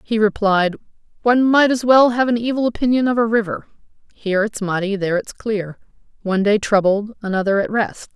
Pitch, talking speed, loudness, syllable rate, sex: 215 Hz, 185 wpm, -18 LUFS, 5.8 syllables/s, female